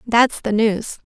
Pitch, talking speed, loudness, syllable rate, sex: 220 Hz, 160 wpm, -18 LUFS, 3.3 syllables/s, female